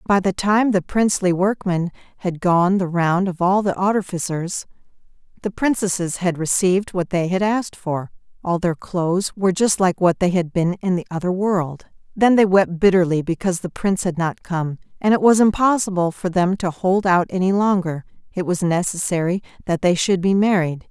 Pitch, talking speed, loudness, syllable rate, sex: 185 Hz, 190 wpm, -19 LUFS, 5.1 syllables/s, female